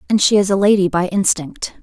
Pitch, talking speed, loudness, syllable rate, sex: 195 Hz, 230 wpm, -15 LUFS, 5.6 syllables/s, female